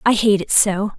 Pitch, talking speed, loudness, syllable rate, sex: 200 Hz, 245 wpm, -16 LUFS, 4.8 syllables/s, female